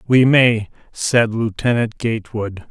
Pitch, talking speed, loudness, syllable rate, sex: 115 Hz, 110 wpm, -17 LUFS, 3.9 syllables/s, male